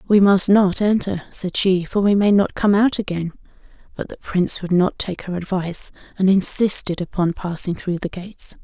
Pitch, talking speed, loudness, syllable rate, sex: 190 Hz, 195 wpm, -19 LUFS, 5.1 syllables/s, female